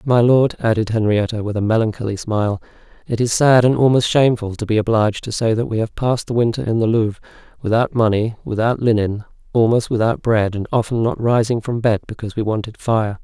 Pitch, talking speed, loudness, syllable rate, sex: 110 Hz, 205 wpm, -18 LUFS, 6.1 syllables/s, male